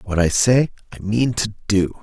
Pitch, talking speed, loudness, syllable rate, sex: 110 Hz, 205 wpm, -19 LUFS, 4.5 syllables/s, male